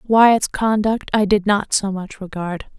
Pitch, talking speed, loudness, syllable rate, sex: 205 Hz, 170 wpm, -18 LUFS, 3.8 syllables/s, female